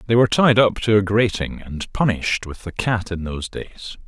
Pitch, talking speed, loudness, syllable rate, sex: 100 Hz, 220 wpm, -20 LUFS, 5.8 syllables/s, male